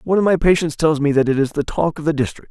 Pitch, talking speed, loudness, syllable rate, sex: 155 Hz, 335 wpm, -18 LUFS, 7.1 syllables/s, male